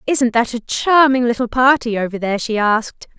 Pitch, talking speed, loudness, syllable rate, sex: 240 Hz, 190 wpm, -16 LUFS, 5.4 syllables/s, female